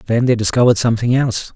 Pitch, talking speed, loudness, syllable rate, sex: 115 Hz, 195 wpm, -15 LUFS, 8.0 syllables/s, male